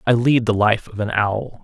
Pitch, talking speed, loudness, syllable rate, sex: 110 Hz, 260 wpm, -18 LUFS, 4.7 syllables/s, male